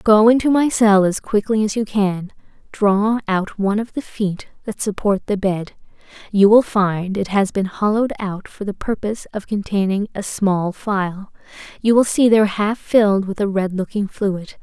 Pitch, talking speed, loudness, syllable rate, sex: 205 Hz, 190 wpm, -18 LUFS, 4.7 syllables/s, female